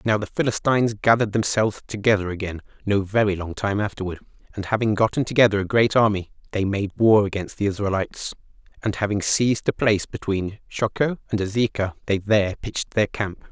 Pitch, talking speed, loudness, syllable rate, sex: 105 Hz, 175 wpm, -22 LUFS, 6.1 syllables/s, male